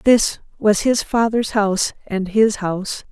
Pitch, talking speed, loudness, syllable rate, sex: 210 Hz, 155 wpm, -18 LUFS, 4.0 syllables/s, female